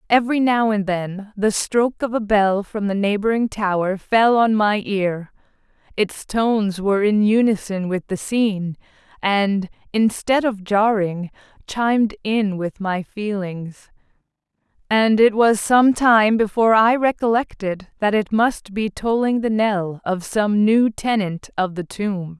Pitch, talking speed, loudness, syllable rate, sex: 210 Hz, 150 wpm, -19 LUFS, 4.1 syllables/s, female